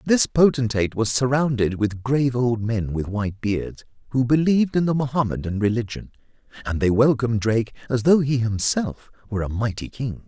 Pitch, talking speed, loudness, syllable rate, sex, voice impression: 120 Hz, 170 wpm, -22 LUFS, 5.5 syllables/s, male, masculine, adult-like, slightly bright, refreshing, sincere, slightly kind